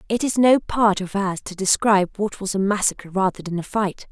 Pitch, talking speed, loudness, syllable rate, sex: 200 Hz, 235 wpm, -21 LUFS, 5.5 syllables/s, female